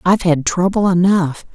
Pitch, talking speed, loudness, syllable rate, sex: 180 Hz, 155 wpm, -15 LUFS, 5.0 syllables/s, female